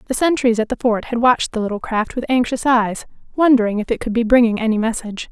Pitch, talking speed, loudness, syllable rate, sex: 235 Hz, 235 wpm, -17 LUFS, 6.5 syllables/s, female